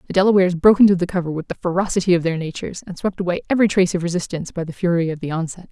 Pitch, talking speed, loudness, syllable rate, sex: 180 Hz, 265 wpm, -19 LUFS, 8.3 syllables/s, female